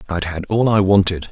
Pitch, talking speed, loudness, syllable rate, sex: 95 Hz, 230 wpm, -17 LUFS, 5.4 syllables/s, male